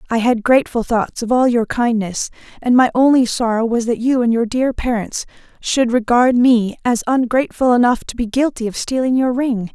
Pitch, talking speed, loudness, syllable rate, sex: 240 Hz, 195 wpm, -16 LUFS, 5.2 syllables/s, female